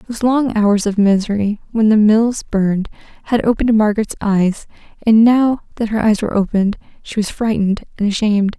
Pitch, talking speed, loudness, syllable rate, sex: 215 Hz, 175 wpm, -16 LUFS, 5.7 syllables/s, female